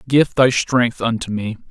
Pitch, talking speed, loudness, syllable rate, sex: 120 Hz, 175 wpm, -17 LUFS, 4.2 syllables/s, male